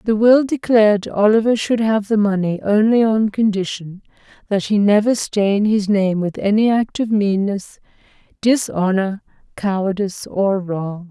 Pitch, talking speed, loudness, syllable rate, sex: 205 Hz, 140 wpm, -17 LUFS, 4.4 syllables/s, female